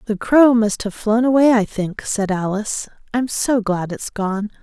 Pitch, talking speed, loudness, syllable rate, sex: 220 Hz, 195 wpm, -18 LUFS, 4.3 syllables/s, female